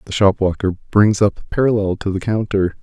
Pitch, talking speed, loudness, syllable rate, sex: 100 Hz, 190 wpm, -17 LUFS, 5.4 syllables/s, male